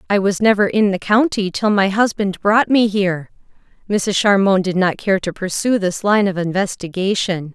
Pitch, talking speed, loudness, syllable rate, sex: 195 Hz, 185 wpm, -17 LUFS, 4.9 syllables/s, female